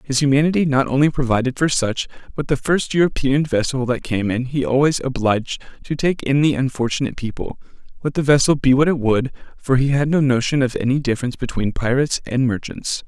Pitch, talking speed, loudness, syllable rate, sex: 135 Hz, 195 wpm, -19 LUFS, 6.0 syllables/s, male